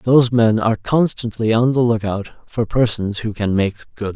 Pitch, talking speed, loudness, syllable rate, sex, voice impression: 115 Hz, 190 wpm, -18 LUFS, 4.9 syllables/s, male, masculine, adult-like, tensed, powerful, bright, soft, raspy, cool, intellectual, slightly refreshing, friendly, reassuring, slightly wild, lively, slightly kind